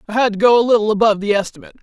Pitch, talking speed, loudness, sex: 215 Hz, 295 wpm, -15 LUFS, female